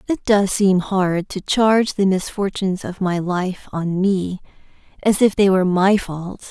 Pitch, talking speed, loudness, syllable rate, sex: 190 Hz, 175 wpm, -19 LUFS, 4.3 syllables/s, female